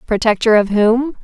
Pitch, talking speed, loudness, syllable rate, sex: 225 Hz, 145 wpm, -14 LUFS, 4.7 syllables/s, female